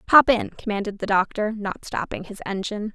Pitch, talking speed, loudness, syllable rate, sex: 210 Hz, 185 wpm, -23 LUFS, 5.9 syllables/s, female